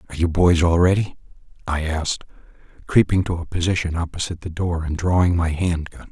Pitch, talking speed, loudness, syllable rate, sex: 85 Hz, 185 wpm, -21 LUFS, 6.0 syllables/s, male